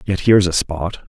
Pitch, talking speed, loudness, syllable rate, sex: 95 Hz, 210 wpm, -17 LUFS, 5.1 syllables/s, male